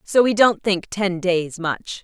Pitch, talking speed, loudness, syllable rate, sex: 190 Hz, 205 wpm, -20 LUFS, 3.6 syllables/s, female